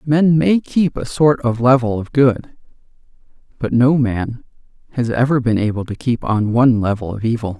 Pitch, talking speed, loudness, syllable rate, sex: 125 Hz, 180 wpm, -16 LUFS, 4.9 syllables/s, male